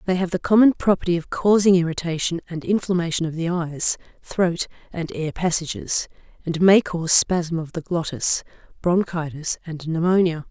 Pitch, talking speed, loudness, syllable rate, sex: 170 Hz, 155 wpm, -21 LUFS, 5.0 syllables/s, female